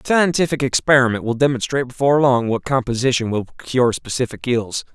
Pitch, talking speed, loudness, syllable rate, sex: 125 Hz, 145 wpm, -18 LUFS, 5.7 syllables/s, male